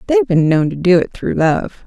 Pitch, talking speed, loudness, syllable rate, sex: 190 Hz, 290 wpm, -15 LUFS, 5.3 syllables/s, female